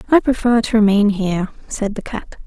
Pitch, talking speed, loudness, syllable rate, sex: 215 Hz, 195 wpm, -17 LUFS, 5.3 syllables/s, female